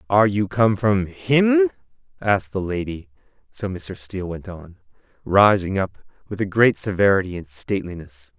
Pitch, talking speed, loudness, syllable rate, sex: 95 Hz, 150 wpm, -21 LUFS, 4.4 syllables/s, male